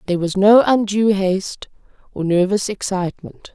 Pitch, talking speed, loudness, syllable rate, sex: 195 Hz, 135 wpm, -17 LUFS, 5.1 syllables/s, female